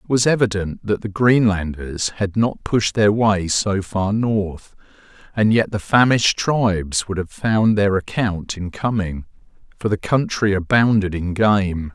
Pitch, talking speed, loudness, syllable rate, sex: 100 Hz, 160 wpm, -19 LUFS, 4.1 syllables/s, male